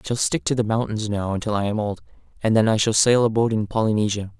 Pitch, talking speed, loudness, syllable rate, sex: 110 Hz, 275 wpm, -21 LUFS, 6.4 syllables/s, male